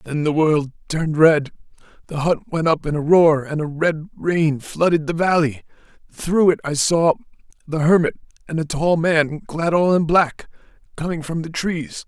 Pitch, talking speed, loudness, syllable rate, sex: 160 Hz, 165 wpm, -19 LUFS, 4.6 syllables/s, male